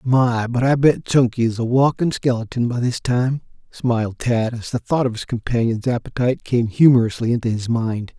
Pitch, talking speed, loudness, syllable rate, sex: 120 Hz, 190 wpm, -19 LUFS, 5.2 syllables/s, male